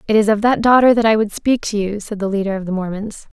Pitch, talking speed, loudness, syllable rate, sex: 210 Hz, 300 wpm, -16 LUFS, 6.4 syllables/s, female